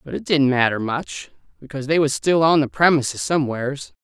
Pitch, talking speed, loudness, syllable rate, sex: 145 Hz, 195 wpm, -19 LUFS, 5.9 syllables/s, male